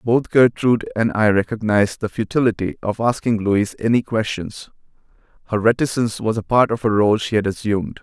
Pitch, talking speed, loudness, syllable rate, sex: 110 Hz, 170 wpm, -19 LUFS, 5.7 syllables/s, male